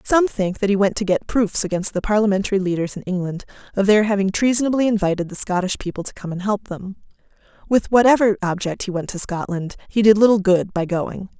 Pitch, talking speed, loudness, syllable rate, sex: 200 Hz, 210 wpm, -19 LUFS, 6.0 syllables/s, female